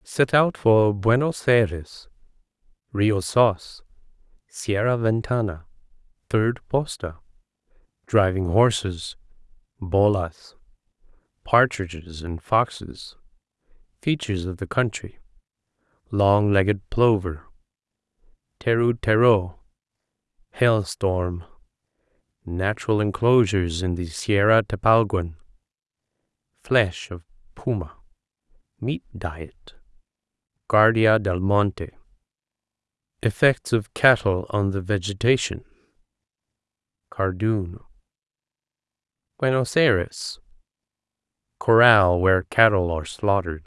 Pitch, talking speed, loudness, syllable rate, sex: 100 Hz, 50 wpm, -22 LUFS, 3.9 syllables/s, male